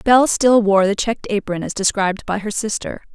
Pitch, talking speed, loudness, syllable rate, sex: 210 Hz, 210 wpm, -18 LUFS, 5.5 syllables/s, female